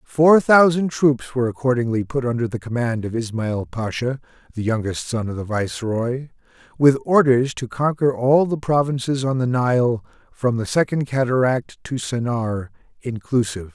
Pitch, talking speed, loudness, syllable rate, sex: 125 Hz, 155 wpm, -20 LUFS, 4.8 syllables/s, male